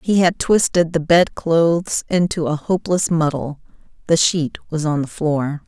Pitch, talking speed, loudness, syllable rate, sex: 165 Hz, 170 wpm, -18 LUFS, 4.4 syllables/s, female